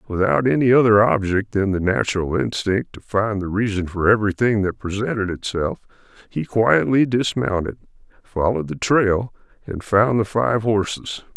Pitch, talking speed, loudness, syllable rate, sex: 105 Hz, 150 wpm, -20 LUFS, 4.8 syllables/s, male